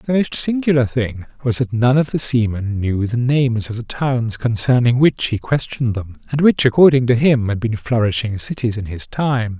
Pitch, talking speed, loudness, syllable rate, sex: 120 Hz, 205 wpm, -17 LUFS, 5.0 syllables/s, male